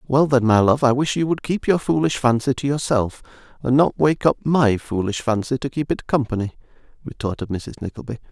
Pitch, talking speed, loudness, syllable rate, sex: 130 Hz, 200 wpm, -20 LUFS, 5.5 syllables/s, male